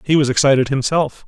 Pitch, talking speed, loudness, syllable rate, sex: 140 Hz, 190 wpm, -16 LUFS, 6.0 syllables/s, male